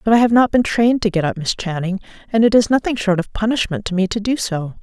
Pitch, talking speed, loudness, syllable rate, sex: 205 Hz, 285 wpm, -17 LUFS, 6.4 syllables/s, female